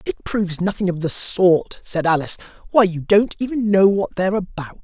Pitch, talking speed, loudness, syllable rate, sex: 185 Hz, 200 wpm, -19 LUFS, 5.3 syllables/s, male